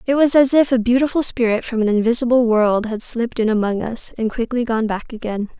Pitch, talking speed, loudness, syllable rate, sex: 235 Hz, 225 wpm, -18 LUFS, 5.8 syllables/s, female